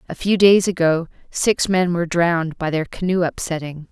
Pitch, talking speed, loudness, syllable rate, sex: 170 Hz, 185 wpm, -19 LUFS, 5.1 syllables/s, female